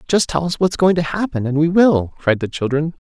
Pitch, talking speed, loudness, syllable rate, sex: 160 Hz, 255 wpm, -17 LUFS, 5.4 syllables/s, male